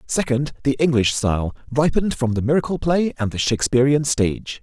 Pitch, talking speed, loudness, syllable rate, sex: 135 Hz, 170 wpm, -20 LUFS, 5.7 syllables/s, male